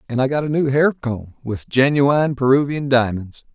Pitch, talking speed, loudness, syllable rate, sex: 135 Hz, 185 wpm, -18 LUFS, 5.0 syllables/s, male